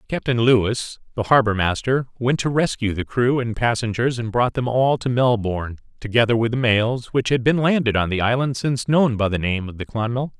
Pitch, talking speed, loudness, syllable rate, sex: 120 Hz, 215 wpm, -20 LUFS, 5.3 syllables/s, male